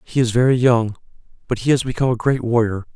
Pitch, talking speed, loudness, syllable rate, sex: 120 Hz, 225 wpm, -18 LUFS, 6.5 syllables/s, male